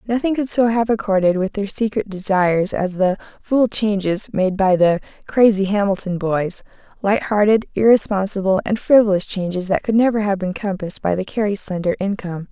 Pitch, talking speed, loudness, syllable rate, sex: 200 Hz, 170 wpm, -18 LUFS, 5.4 syllables/s, female